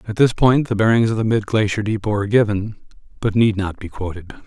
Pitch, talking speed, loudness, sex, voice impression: 105 Hz, 230 wpm, -18 LUFS, male, masculine, adult-like, thick, tensed, powerful, slightly soft, cool, intellectual, calm, mature, slightly friendly, reassuring, wild, lively